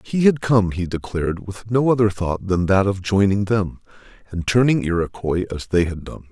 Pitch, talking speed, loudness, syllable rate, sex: 100 Hz, 200 wpm, -20 LUFS, 5.0 syllables/s, male